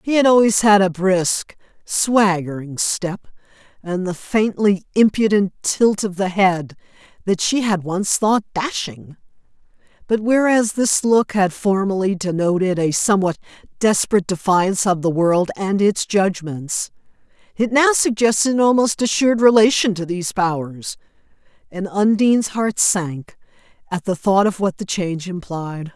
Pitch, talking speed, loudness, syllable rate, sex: 195 Hz, 140 wpm, -18 LUFS, 4.5 syllables/s, female